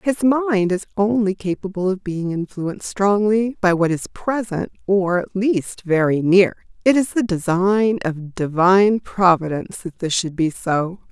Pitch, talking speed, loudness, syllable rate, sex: 190 Hz, 160 wpm, -19 LUFS, 4.3 syllables/s, female